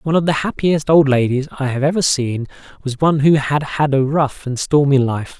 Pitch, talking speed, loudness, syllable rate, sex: 140 Hz, 220 wpm, -16 LUFS, 5.3 syllables/s, male